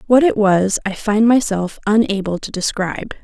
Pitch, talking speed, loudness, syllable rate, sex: 210 Hz, 165 wpm, -17 LUFS, 4.9 syllables/s, female